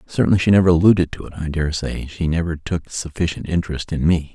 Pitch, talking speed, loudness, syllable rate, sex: 85 Hz, 220 wpm, -19 LUFS, 6.2 syllables/s, male